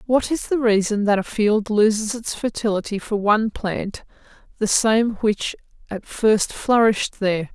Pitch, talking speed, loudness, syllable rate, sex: 215 Hz, 160 wpm, -20 LUFS, 4.5 syllables/s, female